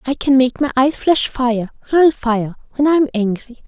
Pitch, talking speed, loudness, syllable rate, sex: 255 Hz, 165 wpm, -16 LUFS, 4.3 syllables/s, female